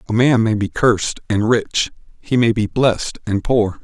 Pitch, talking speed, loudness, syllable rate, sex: 110 Hz, 205 wpm, -17 LUFS, 4.6 syllables/s, male